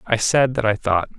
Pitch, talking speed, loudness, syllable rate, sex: 115 Hz, 255 wpm, -19 LUFS, 5.1 syllables/s, male